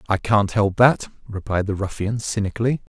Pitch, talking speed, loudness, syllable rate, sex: 105 Hz, 165 wpm, -21 LUFS, 5.2 syllables/s, male